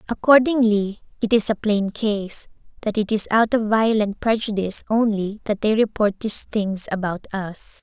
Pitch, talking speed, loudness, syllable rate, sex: 210 Hz, 160 wpm, -21 LUFS, 4.7 syllables/s, female